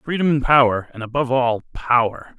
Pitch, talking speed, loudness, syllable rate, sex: 125 Hz, 175 wpm, -19 LUFS, 5.5 syllables/s, male